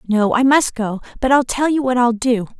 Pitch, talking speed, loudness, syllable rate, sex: 245 Hz, 255 wpm, -17 LUFS, 5.1 syllables/s, female